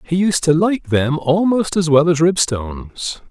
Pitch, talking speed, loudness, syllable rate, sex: 165 Hz, 180 wpm, -16 LUFS, 4.3 syllables/s, male